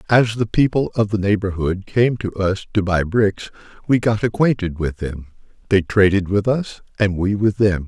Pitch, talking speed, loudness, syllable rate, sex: 100 Hz, 190 wpm, -19 LUFS, 4.7 syllables/s, male